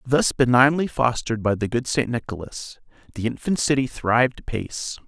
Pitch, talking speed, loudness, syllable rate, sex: 125 Hz, 155 wpm, -22 LUFS, 5.3 syllables/s, male